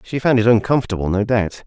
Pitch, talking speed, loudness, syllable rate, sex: 110 Hz, 215 wpm, -17 LUFS, 6.5 syllables/s, male